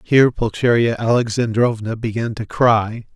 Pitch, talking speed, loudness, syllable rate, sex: 115 Hz, 115 wpm, -18 LUFS, 4.7 syllables/s, male